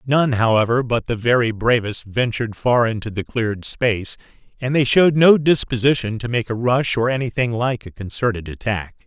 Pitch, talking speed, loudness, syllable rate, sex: 120 Hz, 180 wpm, -19 LUFS, 5.3 syllables/s, male